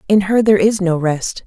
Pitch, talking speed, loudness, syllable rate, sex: 195 Hz, 245 wpm, -15 LUFS, 5.4 syllables/s, female